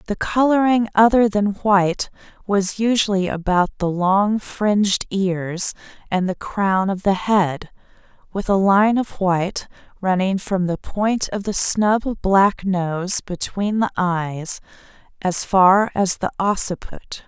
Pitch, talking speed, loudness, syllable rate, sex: 195 Hz, 140 wpm, -19 LUFS, 3.7 syllables/s, female